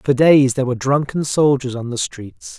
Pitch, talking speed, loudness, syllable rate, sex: 135 Hz, 210 wpm, -17 LUFS, 5.1 syllables/s, male